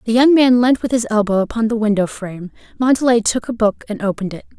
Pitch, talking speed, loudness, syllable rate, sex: 225 Hz, 235 wpm, -16 LUFS, 6.5 syllables/s, female